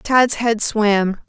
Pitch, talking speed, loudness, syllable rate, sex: 220 Hz, 140 wpm, -17 LUFS, 2.5 syllables/s, female